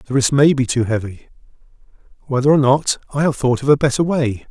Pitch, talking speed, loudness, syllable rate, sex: 135 Hz, 215 wpm, -16 LUFS, 5.7 syllables/s, male